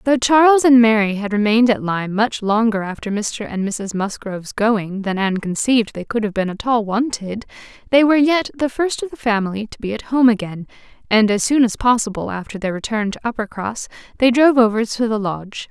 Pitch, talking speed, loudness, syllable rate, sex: 220 Hz, 210 wpm, -18 LUFS, 5.7 syllables/s, female